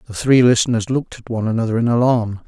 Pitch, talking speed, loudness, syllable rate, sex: 115 Hz, 220 wpm, -17 LUFS, 7.1 syllables/s, male